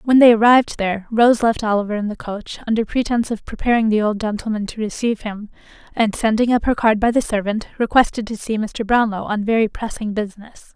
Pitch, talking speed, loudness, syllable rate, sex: 220 Hz, 205 wpm, -18 LUFS, 6.0 syllables/s, female